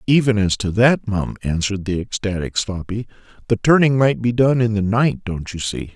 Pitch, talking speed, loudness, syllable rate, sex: 105 Hz, 200 wpm, -19 LUFS, 5.1 syllables/s, male